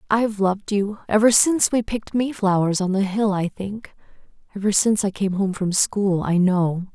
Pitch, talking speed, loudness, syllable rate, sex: 200 Hz, 175 wpm, -20 LUFS, 5.2 syllables/s, female